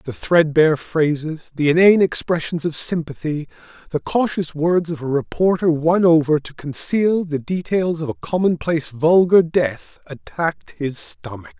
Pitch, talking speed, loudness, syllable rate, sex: 160 Hz, 145 wpm, -19 LUFS, 4.6 syllables/s, male